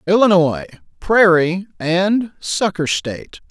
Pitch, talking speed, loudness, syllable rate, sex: 185 Hz, 85 wpm, -16 LUFS, 3.7 syllables/s, male